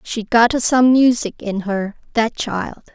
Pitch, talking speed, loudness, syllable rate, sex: 225 Hz, 165 wpm, -17 LUFS, 3.9 syllables/s, female